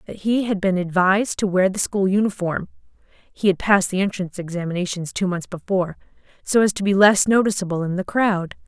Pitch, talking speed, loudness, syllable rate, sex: 190 Hz, 185 wpm, -20 LUFS, 3.9 syllables/s, female